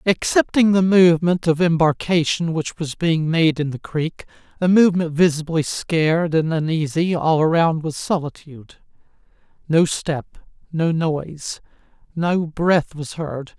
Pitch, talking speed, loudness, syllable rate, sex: 165 Hz, 130 wpm, -19 LUFS, 4.4 syllables/s, male